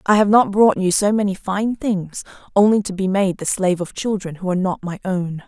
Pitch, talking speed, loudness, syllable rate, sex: 195 Hz, 240 wpm, -19 LUFS, 5.4 syllables/s, female